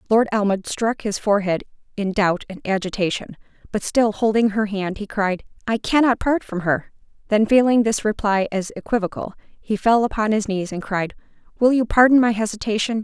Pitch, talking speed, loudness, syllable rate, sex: 210 Hz, 180 wpm, -20 LUFS, 5.3 syllables/s, female